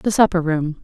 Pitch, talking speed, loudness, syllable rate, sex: 170 Hz, 215 wpm, -18 LUFS, 5.1 syllables/s, female